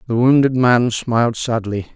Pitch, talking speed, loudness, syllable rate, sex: 120 Hz, 155 wpm, -16 LUFS, 4.7 syllables/s, male